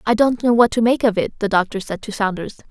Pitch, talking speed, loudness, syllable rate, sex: 220 Hz, 290 wpm, -18 LUFS, 6.1 syllables/s, female